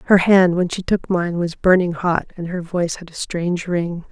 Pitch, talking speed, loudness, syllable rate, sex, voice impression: 175 Hz, 235 wpm, -19 LUFS, 5.0 syllables/s, female, feminine, adult-like, slightly soft, calm, reassuring, slightly sweet